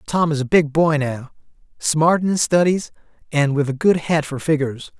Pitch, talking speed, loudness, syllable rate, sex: 150 Hz, 205 wpm, -19 LUFS, 5.0 syllables/s, male